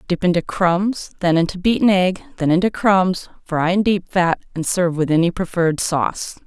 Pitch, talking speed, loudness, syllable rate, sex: 180 Hz, 185 wpm, -18 LUFS, 5.1 syllables/s, female